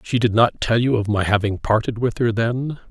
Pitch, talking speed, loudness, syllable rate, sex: 115 Hz, 250 wpm, -20 LUFS, 5.1 syllables/s, male